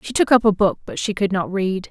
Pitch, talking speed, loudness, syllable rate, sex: 200 Hz, 315 wpm, -19 LUFS, 5.7 syllables/s, female